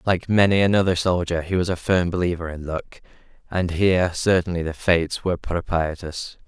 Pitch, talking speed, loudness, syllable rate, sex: 90 Hz, 165 wpm, -22 LUFS, 5.4 syllables/s, male